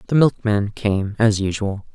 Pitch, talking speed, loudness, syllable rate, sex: 105 Hz, 155 wpm, -20 LUFS, 4.2 syllables/s, male